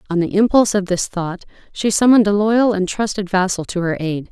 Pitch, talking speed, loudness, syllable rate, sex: 195 Hz, 220 wpm, -17 LUFS, 5.9 syllables/s, female